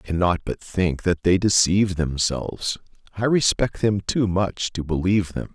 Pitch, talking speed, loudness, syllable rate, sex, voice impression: 95 Hz, 175 wpm, -22 LUFS, 4.8 syllables/s, male, masculine, adult-like, slightly thick, slightly cool, sincere, slightly wild